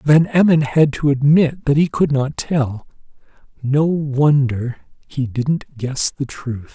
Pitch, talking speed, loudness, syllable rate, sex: 140 Hz, 150 wpm, -17 LUFS, 3.5 syllables/s, male